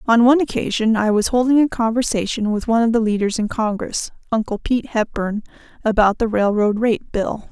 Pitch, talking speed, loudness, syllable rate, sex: 225 Hz, 185 wpm, -18 LUFS, 5.7 syllables/s, female